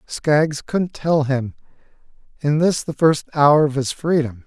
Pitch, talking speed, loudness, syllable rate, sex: 150 Hz, 175 wpm, -19 LUFS, 4.1 syllables/s, male